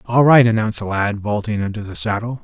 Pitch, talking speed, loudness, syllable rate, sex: 110 Hz, 220 wpm, -17 LUFS, 6.1 syllables/s, male